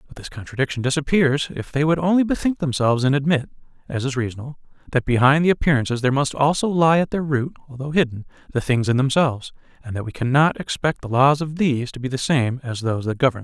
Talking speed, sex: 230 wpm, male